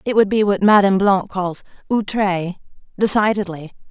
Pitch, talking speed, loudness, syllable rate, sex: 195 Hz, 140 wpm, -17 LUFS, 4.7 syllables/s, female